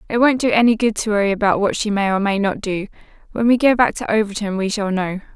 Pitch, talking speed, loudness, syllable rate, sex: 210 Hz, 270 wpm, -18 LUFS, 6.3 syllables/s, female